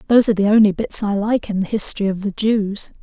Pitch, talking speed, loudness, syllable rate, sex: 210 Hz, 260 wpm, -17 LUFS, 6.5 syllables/s, female